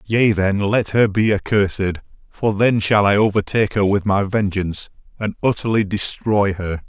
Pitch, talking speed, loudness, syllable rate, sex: 100 Hz, 165 wpm, -18 LUFS, 5.0 syllables/s, male